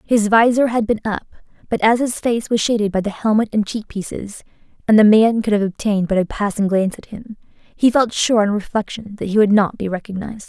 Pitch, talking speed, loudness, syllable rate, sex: 215 Hz, 230 wpm, -17 LUFS, 5.9 syllables/s, female